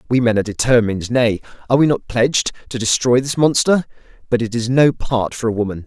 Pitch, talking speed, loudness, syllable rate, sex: 120 Hz, 195 wpm, -17 LUFS, 6.3 syllables/s, male